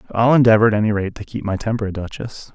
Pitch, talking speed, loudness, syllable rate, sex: 110 Hz, 235 wpm, -18 LUFS, 6.7 syllables/s, male